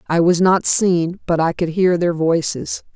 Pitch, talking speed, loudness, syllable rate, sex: 170 Hz, 205 wpm, -17 LUFS, 4.2 syllables/s, female